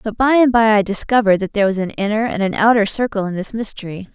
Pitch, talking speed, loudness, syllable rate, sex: 210 Hz, 260 wpm, -16 LUFS, 6.8 syllables/s, female